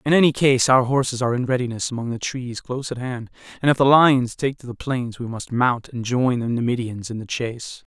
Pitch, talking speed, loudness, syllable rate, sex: 125 Hz, 240 wpm, -21 LUFS, 5.6 syllables/s, male